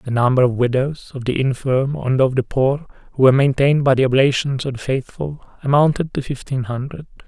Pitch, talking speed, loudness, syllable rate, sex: 135 Hz, 200 wpm, -18 LUFS, 5.6 syllables/s, male